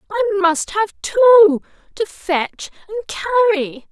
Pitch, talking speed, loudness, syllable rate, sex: 390 Hz, 105 wpm, -16 LUFS, 6.3 syllables/s, female